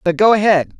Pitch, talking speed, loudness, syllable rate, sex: 190 Hz, 225 wpm, -13 LUFS, 6.1 syllables/s, female